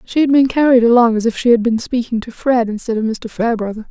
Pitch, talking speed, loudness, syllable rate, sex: 235 Hz, 260 wpm, -15 LUFS, 6.3 syllables/s, female